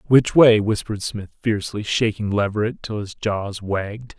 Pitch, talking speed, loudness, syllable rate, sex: 105 Hz, 160 wpm, -21 LUFS, 4.8 syllables/s, male